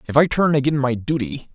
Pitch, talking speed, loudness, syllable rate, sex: 135 Hz, 235 wpm, -19 LUFS, 5.9 syllables/s, male